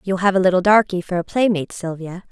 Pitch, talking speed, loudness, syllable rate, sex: 185 Hz, 235 wpm, -18 LUFS, 6.5 syllables/s, female